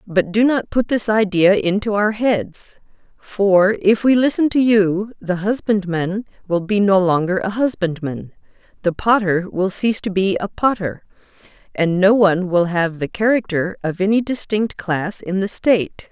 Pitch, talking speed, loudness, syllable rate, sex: 200 Hz, 170 wpm, -18 LUFS, 4.4 syllables/s, female